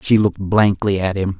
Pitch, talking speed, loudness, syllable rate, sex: 100 Hz, 215 wpm, -17 LUFS, 5.4 syllables/s, male